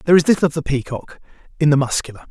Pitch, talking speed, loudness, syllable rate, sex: 150 Hz, 235 wpm, -18 LUFS, 8.1 syllables/s, male